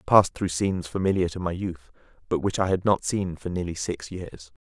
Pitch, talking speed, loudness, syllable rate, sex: 90 Hz, 235 wpm, -26 LUFS, 5.8 syllables/s, male